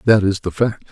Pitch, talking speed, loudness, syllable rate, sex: 105 Hz, 265 wpm, -18 LUFS, 5.5 syllables/s, male